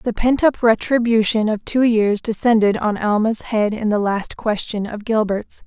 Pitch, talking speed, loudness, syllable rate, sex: 220 Hz, 180 wpm, -18 LUFS, 4.4 syllables/s, female